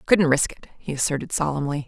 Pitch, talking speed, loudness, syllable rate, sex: 150 Hz, 190 wpm, -23 LUFS, 6.0 syllables/s, female